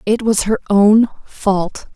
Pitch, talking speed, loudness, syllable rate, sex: 210 Hz, 155 wpm, -15 LUFS, 3.3 syllables/s, female